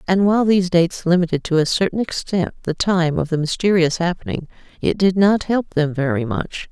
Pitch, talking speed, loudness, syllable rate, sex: 175 Hz, 195 wpm, -19 LUFS, 5.6 syllables/s, female